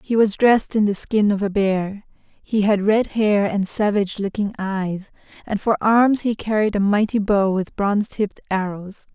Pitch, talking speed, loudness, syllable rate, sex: 205 Hz, 190 wpm, -20 LUFS, 4.7 syllables/s, female